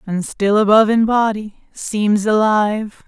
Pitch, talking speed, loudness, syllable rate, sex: 210 Hz, 135 wpm, -16 LUFS, 4.2 syllables/s, female